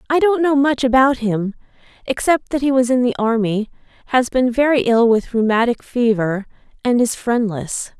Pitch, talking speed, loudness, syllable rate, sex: 245 Hz, 175 wpm, -17 LUFS, 4.9 syllables/s, female